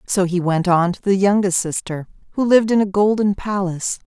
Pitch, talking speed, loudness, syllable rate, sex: 190 Hz, 205 wpm, -18 LUFS, 5.6 syllables/s, female